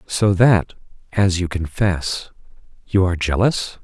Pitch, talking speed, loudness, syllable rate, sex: 95 Hz, 125 wpm, -19 LUFS, 4.0 syllables/s, male